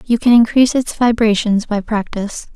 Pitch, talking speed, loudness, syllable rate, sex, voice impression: 225 Hz, 165 wpm, -15 LUFS, 5.4 syllables/s, female, feminine, young, clear, cute, friendly, slightly kind